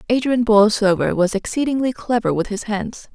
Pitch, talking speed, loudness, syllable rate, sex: 220 Hz, 150 wpm, -18 LUFS, 5.1 syllables/s, female